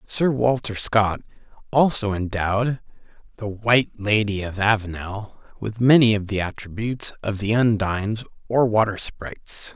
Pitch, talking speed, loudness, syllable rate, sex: 105 Hz, 130 wpm, -21 LUFS, 4.6 syllables/s, male